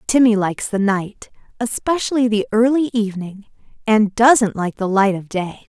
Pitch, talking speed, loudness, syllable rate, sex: 215 Hz, 155 wpm, -17 LUFS, 4.8 syllables/s, female